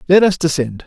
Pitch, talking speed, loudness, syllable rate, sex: 160 Hz, 210 wpm, -15 LUFS, 5.8 syllables/s, male